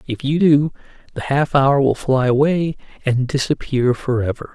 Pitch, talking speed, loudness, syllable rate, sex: 135 Hz, 145 wpm, -18 LUFS, 4.4 syllables/s, male